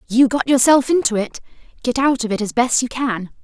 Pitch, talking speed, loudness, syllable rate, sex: 245 Hz, 225 wpm, -17 LUFS, 5.5 syllables/s, female